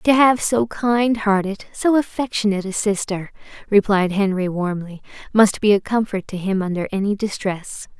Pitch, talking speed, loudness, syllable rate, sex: 205 Hz, 160 wpm, -19 LUFS, 4.8 syllables/s, female